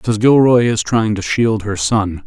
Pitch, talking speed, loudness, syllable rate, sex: 110 Hz, 210 wpm, -14 LUFS, 4.1 syllables/s, male